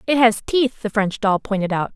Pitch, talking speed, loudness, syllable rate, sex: 220 Hz, 245 wpm, -19 LUFS, 5.1 syllables/s, female